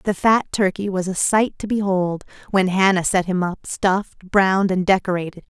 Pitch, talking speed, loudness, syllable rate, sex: 190 Hz, 185 wpm, -19 LUFS, 4.9 syllables/s, female